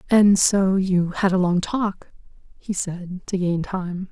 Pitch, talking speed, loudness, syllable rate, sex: 185 Hz, 175 wpm, -21 LUFS, 3.5 syllables/s, female